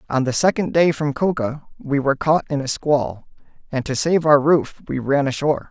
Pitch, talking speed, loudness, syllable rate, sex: 145 Hz, 210 wpm, -19 LUFS, 5.1 syllables/s, male